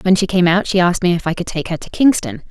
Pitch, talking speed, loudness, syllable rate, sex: 185 Hz, 335 wpm, -16 LUFS, 6.8 syllables/s, female